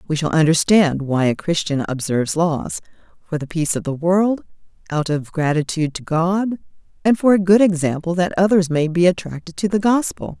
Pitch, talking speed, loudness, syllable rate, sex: 170 Hz, 185 wpm, -18 LUFS, 5.4 syllables/s, female